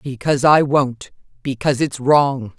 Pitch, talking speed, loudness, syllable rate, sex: 135 Hz, 140 wpm, -17 LUFS, 4.6 syllables/s, female